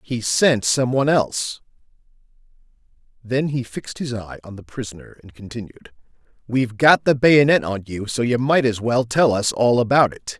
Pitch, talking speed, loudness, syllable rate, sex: 120 Hz, 175 wpm, -19 LUFS, 5.1 syllables/s, male